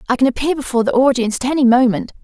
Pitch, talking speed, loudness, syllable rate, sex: 250 Hz, 240 wpm, -15 LUFS, 8.3 syllables/s, female